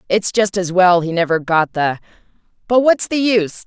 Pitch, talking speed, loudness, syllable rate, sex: 190 Hz, 180 wpm, -16 LUFS, 5.0 syllables/s, female